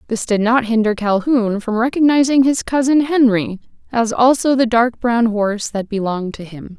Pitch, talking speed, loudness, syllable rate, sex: 235 Hz, 175 wpm, -16 LUFS, 5.0 syllables/s, female